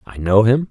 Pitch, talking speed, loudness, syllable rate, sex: 115 Hz, 255 wpm, -15 LUFS, 5.1 syllables/s, male